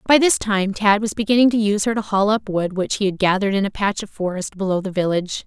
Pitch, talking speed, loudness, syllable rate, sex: 200 Hz, 275 wpm, -19 LUFS, 6.4 syllables/s, female